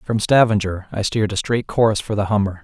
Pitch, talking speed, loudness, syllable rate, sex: 105 Hz, 230 wpm, -19 LUFS, 5.9 syllables/s, male